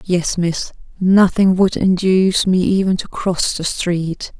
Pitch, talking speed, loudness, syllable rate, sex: 180 Hz, 150 wpm, -16 LUFS, 3.8 syllables/s, female